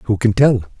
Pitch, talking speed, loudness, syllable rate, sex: 110 Hz, 225 wpm, -15 LUFS, 4.3 syllables/s, male